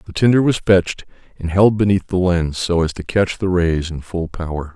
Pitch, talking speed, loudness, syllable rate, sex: 90 Hz, 225 wpm, -17 LUFS, 5.2 syllables/s, male